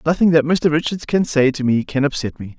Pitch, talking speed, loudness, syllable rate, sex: 150 Hz, 255 wpm, -18 LUFS, 5.7 syllables/s, male